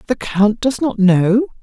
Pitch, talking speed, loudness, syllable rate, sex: 220 Hz, 185 wpm, -15 LUFS, 3.8 syllables/s, female